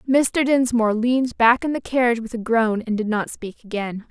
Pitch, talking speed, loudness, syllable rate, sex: 235 Hz, 220 wpm, -20 LUFS, 5.5 syllables/s, female